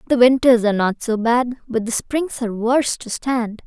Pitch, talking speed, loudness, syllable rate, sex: 240 Hz, 215 wpm, -19 LUFS, 5.1 syllables/s, female